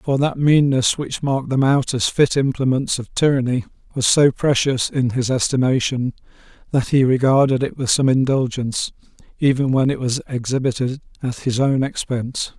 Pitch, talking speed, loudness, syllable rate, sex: 130 Hz, 160 wpm, -19 LUFS, 5.0 syllables/s, male